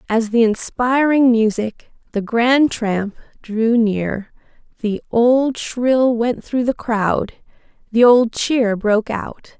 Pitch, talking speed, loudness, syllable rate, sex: 230 Hz, 130 wpm, -17 LUFS, 3.2 syllables/s, female